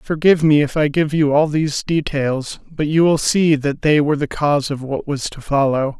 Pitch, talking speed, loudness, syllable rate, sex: 145 Hz, 230 wpm, -17 LUFS, 5.1 syllables/s, male